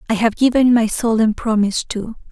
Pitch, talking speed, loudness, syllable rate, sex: 225 Hz, 180 wpm, -17 LUFS, 5.7 syllables/s, female